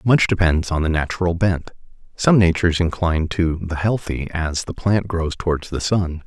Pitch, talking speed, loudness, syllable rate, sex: 85 Hz, 180 wpm, -20 LUFS, 4.9 syllables/s, male